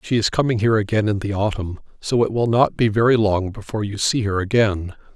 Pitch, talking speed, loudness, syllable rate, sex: 105 Hz, 235 wpm, -20 LUFS, 5.9 syllables/s, male